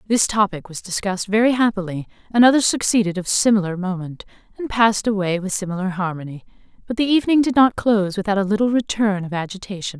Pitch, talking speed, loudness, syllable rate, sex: 205 Hz, 180 wpm, -19 LUFS, 6.5 syllables/s, female